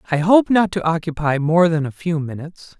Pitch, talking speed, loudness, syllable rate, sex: 165 Hz, 215 wpm, -18 LUFS, 5.5 syllables/s, male